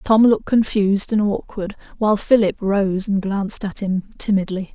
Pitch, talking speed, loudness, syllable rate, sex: 200 Hz, 165 wpm, -19 LUFS, 5.0 syllables/s, female